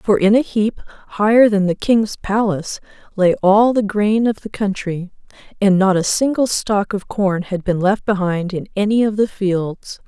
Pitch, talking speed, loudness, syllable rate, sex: 200 Hz, 190 wpm, -17 LUFS, 4.3 syllables/s, female